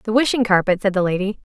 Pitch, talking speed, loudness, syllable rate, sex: 205 Hz, 245 wpm, -18 LUFS, 6.9 syllables/s, female